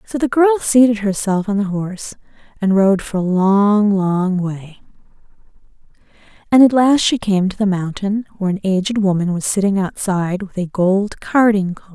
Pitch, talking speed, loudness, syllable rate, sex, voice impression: 200 Hz, 175 wpm, -16 LUFS, 4.8 syllables/s, female, very feminine, very adult-like, middle-aged, very thin, relaxed, slightly powerful, bright, very soft, very clear, very fluent, very cute, very intellectual, very refreshing, very sincere, very calm, very friendly, very reassuring, unique, very elegant, very sweet, very lively, kind, slightly modest